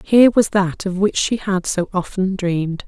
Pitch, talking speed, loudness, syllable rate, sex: 190 Hz, 210 wpm, -18 LUFS, 4.8 syllables/s, female